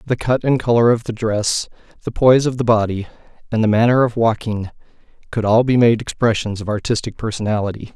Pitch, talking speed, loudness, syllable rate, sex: 115 Hz, 190 wpm, -17 LUFS, 6.0 syllables/s, male